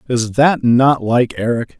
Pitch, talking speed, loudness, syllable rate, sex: 125 Hz, 170 wpm, -14 LUFS, 3.8 syllables/s, male